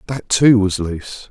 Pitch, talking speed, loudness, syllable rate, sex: 105 Hz, 185 wpm, -16 LUFS, 4.4 syllables/s, male